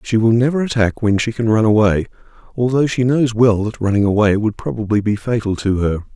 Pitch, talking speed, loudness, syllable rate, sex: 110 Hz, 215 wpm, -16 LUFS, 5.7 syllables/s, male